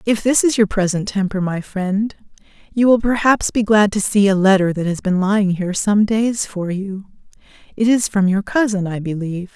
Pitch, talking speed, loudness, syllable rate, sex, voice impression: 200 Hz, 205 wpm, -17 LUFS, 5.1 syllables/s, female, feminine, adult-like, relaxed, slightly weak, soft, fluent, intellectual, calm, friendly, elegant, kind, modest